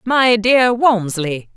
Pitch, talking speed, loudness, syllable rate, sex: 220 Hz, 115 wpm, -15 LUFS, 2.8 syllables/s, female